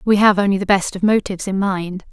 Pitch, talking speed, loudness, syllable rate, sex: 195 Hz, 255 wpm, -17 LUFS, 6.0 syllables/s, female